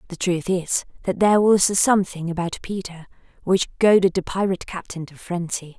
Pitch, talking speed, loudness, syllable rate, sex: 180 Hz, 175 wpm, -21 LUFS, 5.6 syllables/s, female